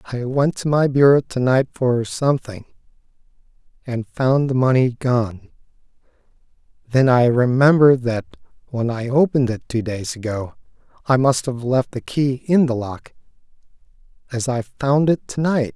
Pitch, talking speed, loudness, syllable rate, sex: 130 Hz, 150 wpm, -19 LUFS, 4.6 syllables/s, male